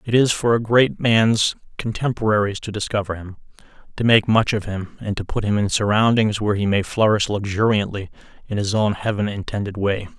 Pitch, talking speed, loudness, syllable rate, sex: 105 Hz, 190 wpm, -20 LUFS, 5.5 syllables/s, male